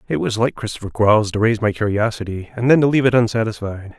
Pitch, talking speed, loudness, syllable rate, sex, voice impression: 110 Hz, 225 wpm, -18 LUFS, 6.9 syllables/s, male, very masculine, middle-aged, slightly thin, cool, slightly intellectual, calm, slightly elegant